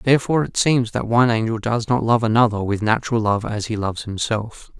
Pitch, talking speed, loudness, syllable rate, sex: 115 Hz, 215 wpm, -20 LUFS, 5.9 syllables/s, male